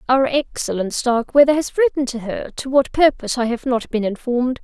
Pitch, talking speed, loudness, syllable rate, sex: 255 Hz, 180 wpm, -19 LUFS, 5.8 syllables/s, female